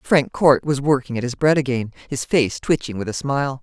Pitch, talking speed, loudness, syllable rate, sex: 135 Hz, 230 wpm, -20 LUFS, 5.6 syllables/s, female